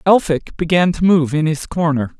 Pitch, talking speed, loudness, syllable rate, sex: 160 Hz, 190 wpm, -16 LUFS, 5.0 syllables/s, male